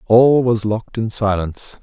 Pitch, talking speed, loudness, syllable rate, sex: 110 Hz, 165 wpm, -17 LUFS, 4.8 syllables/s, male